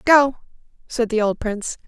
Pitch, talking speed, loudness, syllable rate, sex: 235 Hz, 160 wpm, -20 LUFS, 5.1 syllables/s, female